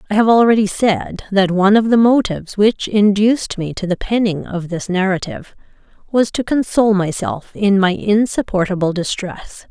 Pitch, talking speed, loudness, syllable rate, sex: 200 Hz, 160 wpm, -16 LUFS, 5.1 syllables/s, female